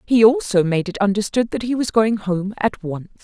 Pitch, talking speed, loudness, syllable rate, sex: 210 Hz, 225 wpm, -19 LUFS, 5.1 syllables/s, female